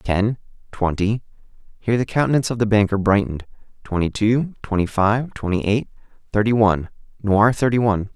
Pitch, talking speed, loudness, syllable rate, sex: 105 Hz, 110 wpm, -20 LUFS, 6.1 syllables/s, male